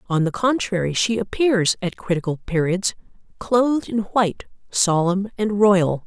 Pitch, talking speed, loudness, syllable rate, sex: 195 Hz, 140 wpm, -20 LUFS, 4.5 syllables/s, female